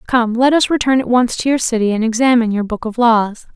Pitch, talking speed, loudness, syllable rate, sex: 235 Hz, 255 wpm, -15 LUFS, 6.0 syllables/s, female